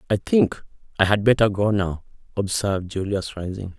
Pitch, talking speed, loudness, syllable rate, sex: 100 Hz, 160 wpm, -22 LUFS, 5.1 syllables/s, male